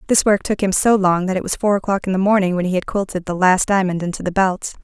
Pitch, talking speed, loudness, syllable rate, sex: 190 Hz, 300 wpm, -18 LUFS, 6.4 syllables/s, female